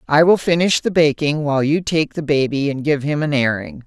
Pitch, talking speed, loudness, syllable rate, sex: 150 Hz, 235 wpm, -17 LUFS, 5.4 syllables/s, female